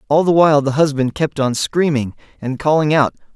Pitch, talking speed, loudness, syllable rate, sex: 140 Hz, 195 wpm, -16 LUFS, 5.5 syllables/s, male